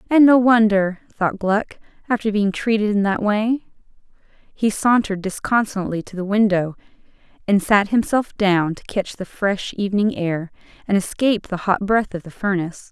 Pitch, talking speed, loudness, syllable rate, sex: 205 Hz, 165 wpm, -19 LUFS, 5.1 syllables/s, female